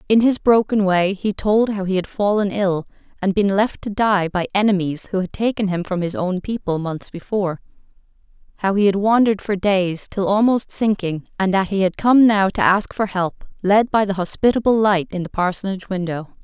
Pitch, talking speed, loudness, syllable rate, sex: 195 Hz, 205 wpm, -19 LUFS, 5.2 syllables/s, female